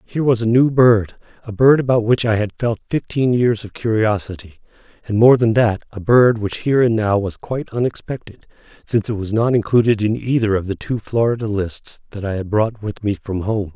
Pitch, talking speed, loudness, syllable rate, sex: 110 Hz, 215 wpm, -17 LUFS, 5.5 syllables/s, male